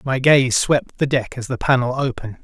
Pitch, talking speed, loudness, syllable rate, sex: 130 Hz, 220 wpm, -18 LUFS, 5.2 syllables/s, male